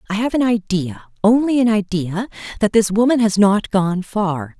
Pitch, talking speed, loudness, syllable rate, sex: 210 Hz, 155 wpm, -17 LUFS, 4.7 syllables/s, female